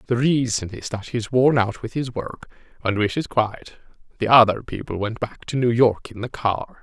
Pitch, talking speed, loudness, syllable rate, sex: 115 Hz, 210 wpm, -21 LUFS, 4.9 syllables/s, male